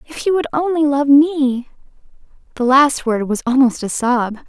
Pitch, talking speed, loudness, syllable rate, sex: 270 Hz, 175 wpm, -16 LUFS, 4.5 syllables/s, female